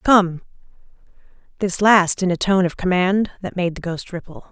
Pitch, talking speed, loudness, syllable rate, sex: 185 Hz, 175 wpm, -19 LUFS, 4.9 syllables/s, female